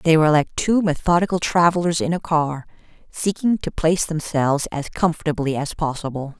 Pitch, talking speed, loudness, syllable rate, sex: 160 Hz, 160 wpm, -20 LUFS, 5.5 syllables/s, female